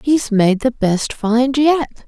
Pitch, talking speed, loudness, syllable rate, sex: 245 Hz, 175 wpm, -16 LUFS, 3.3 syllables/s, female